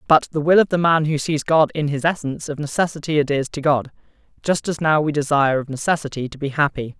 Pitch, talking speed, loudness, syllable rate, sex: 150 Hz, 230 wpm, -20 LUFS, 6.4 syllables/s, male